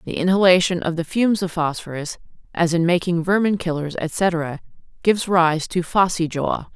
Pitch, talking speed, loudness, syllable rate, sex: 170 Hz, 160 wpm, -20 LUFS, 5.0 syllables/s, female